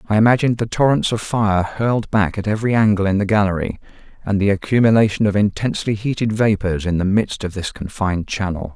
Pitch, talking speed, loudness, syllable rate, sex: 105 Hz, 190 wpm, -18 LUFS, 6.1 syllables/s, male